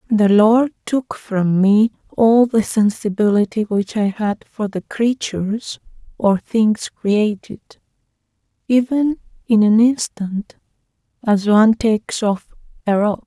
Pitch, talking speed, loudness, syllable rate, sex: 215 Hz, 120 wpm, -17 LUFS, 3.7 syllables/s, female